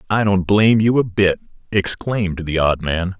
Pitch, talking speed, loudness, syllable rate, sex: 95 Hz, 190 wpm, -17 LUFS, 4.9 syllables/s, male